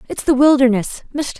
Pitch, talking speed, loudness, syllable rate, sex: 265 Hz, 130 wpm, -16 LUFS, 5.4 syllables/s, female